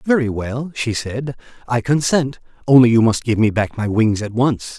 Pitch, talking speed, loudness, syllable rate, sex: 125 Hz, 200 wpm, -17 LUFS, 4.7 syllables/s, male